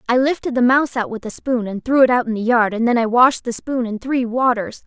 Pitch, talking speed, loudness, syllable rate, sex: 245 Hz, 295 wpm, -18 LUFS, 5.8 syllables/s, female